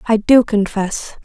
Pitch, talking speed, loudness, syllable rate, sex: 215 Hz, 145 wpm, -15 LUFS, 4.0 syllables/s, female